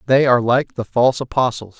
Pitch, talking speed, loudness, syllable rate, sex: 125 Hz, 200 wpm, -17 LUFS, 6.2 syllables/s, male